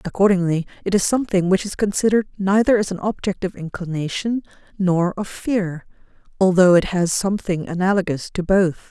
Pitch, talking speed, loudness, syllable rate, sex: 190 Hz, 155 wpm, -20 LUFS, 5.6 syllables/s, female